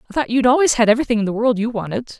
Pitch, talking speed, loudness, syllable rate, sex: 235 Hz, 300 wpm, -17 LUFS, 8.1 syllables/s, female